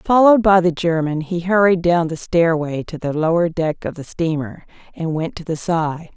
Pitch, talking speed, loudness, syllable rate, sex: 170 Hz, 205 wpm, -18 LUFS, 4.8 syllables/s, female